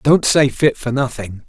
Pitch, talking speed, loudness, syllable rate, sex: 130 Hz, 205 wpm, -16 LUFS, 4.2 syllables/s, male